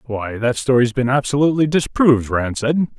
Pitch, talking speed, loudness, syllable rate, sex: 130 Hz, 160 wpm, -17 LUFS, 5.5 syllables/s, male